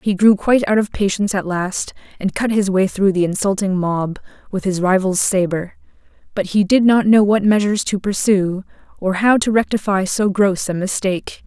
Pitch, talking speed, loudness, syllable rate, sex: 195 Hz, 195 wpm, -17 LUFS, 5.2 syllables/s, female